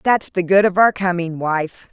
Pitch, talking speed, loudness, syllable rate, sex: 180 Hz, 220 wpm, -17 LUFS, 4.4 syllables/s, female